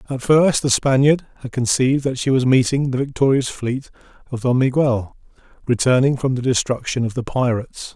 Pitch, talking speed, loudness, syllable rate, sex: 130 Hz, 175 wpm, -18 LUFS, 5.4 syllables/s, male